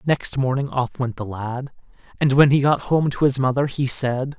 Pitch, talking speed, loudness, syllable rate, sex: 135 Hz, 220 wpm, -20 LUFS, 4.8 syllables/s, male